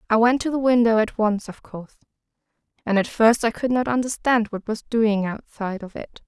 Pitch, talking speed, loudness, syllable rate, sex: 225 Hz, 210 wpm, -21 LUFS, 5.5 syllables/s, female